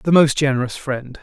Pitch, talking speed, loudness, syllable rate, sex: 140 Hz, 195 wpm, -18 LUFS, 5.1 syllables/s, male